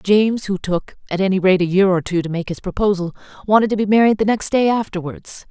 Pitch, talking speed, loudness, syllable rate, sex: 195 Hz, 240 wpm, -18 LUFS, 6.0 syllables/s, female